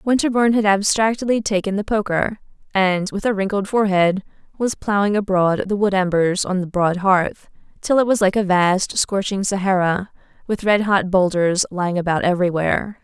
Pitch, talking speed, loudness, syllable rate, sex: 195 Hz, 165 wpm, -19 LUFS, 5.2 syllables/s, female